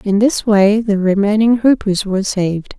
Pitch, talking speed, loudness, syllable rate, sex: 205 Hz, 170 wpm, -14 LUFS, 4.9 syllables/s, female